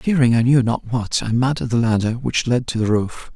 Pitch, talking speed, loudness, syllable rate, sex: 120 Hz, 250 wpm, -19 LUFS, 5.3 syllables/s, male